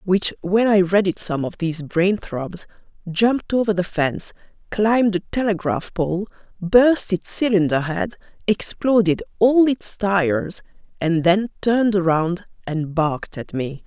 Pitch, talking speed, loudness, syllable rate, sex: 190 Hz, 145 wpm, -20 LUFS, 4.3 syllables/s, female